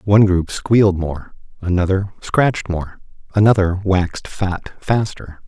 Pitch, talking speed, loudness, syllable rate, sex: 95 Hz, 120 wpm, -18 LUFS, 4.4 syllables/s, male